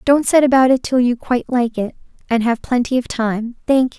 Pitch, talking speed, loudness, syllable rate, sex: 245 Hz, 240 wpm, -17 LUFS, 5.6 syllables/s, female